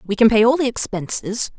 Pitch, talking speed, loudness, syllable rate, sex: 225 Hz, 225 wpm, -18 LUFS, 5.5 syllables/s, female